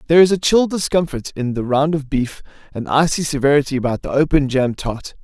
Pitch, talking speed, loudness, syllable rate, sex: 145 Hz, 205 wpm, -18 LUFS, 5.8 syllables/s, male